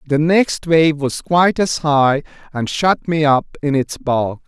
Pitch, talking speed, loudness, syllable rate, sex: 150 Hz, 190 wpm, -16 LUFS, 3.9 syllables/s, male